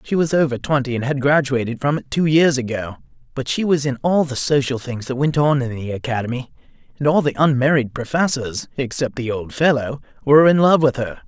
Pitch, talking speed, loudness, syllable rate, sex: 135 Hz, 215 wpm, -19 LUFS, 5.7 syllables/s, male